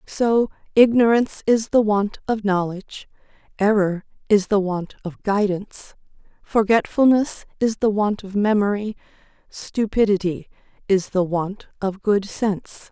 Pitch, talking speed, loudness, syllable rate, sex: 205 Hz, 120 wpm, -20 LUFS, 4.3 syllables/s, female